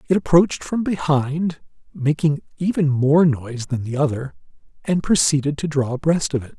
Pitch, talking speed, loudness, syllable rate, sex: 150 Hz, 165 wpm, -20 LUFS, 5.2 syllables/s, male